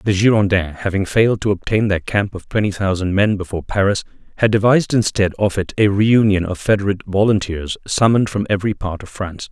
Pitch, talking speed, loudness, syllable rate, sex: 100 Hz, 190 wpm, -17 LUFS, 6.1 syllables/s, male